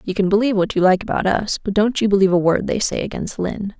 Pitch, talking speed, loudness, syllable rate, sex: 200 Hz, 285 wpm, -18 LUFS, 6.9 syllables/s, female